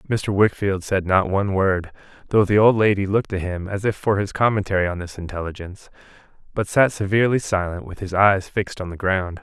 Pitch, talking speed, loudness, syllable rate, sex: 100 Hz, 205 wpm, -21 LUFS, 5.8 syllables/s, male